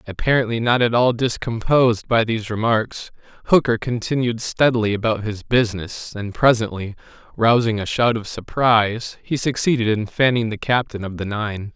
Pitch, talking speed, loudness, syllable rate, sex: 115 Hz, 155 wpm, -19 LUFS, 5.1 syllables/s, male